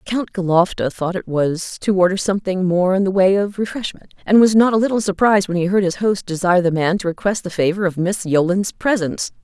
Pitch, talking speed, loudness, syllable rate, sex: 190 Hz, 230 wpm, -18 LUFS, 5.8 syllables/s, female